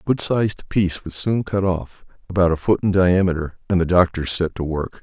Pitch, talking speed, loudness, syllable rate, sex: 90 Hz, 225 wpm, -20 LUFS, 5.4 syllables/s, male